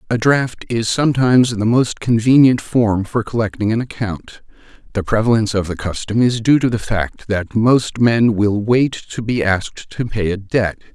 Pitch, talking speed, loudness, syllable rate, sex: 110 Hz, 185 wpm, -17 LUFS, 4.7 syllables/s, male